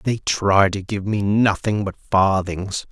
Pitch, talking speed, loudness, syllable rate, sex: 100 Hz, 165 wpm, -20 LUFS, 3.8 syllables/s, male